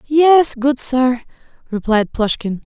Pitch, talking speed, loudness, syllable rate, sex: 255 Hz, 110 wpm, -16 LUFS, 3.4 syllables/s, female